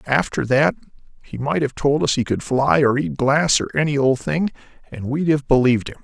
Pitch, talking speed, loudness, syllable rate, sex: 135 Hz, 220 wpm, -19 LUFS, 5.2 syllables/s, male